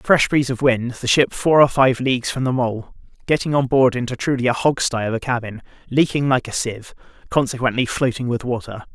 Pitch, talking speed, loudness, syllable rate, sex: 125 Hz, 215 wpm, -19 LUFS, 5.7 syllables/s, male